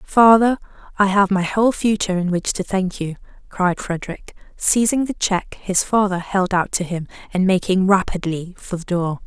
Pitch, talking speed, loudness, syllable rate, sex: 190 Hz, 180 wpm, -19 LUFS, 4.9 syllables/s, female